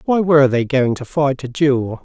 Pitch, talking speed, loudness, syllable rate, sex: 140 Hz, 235 wpm, -16 LUFS, 4.7 syllables/s, male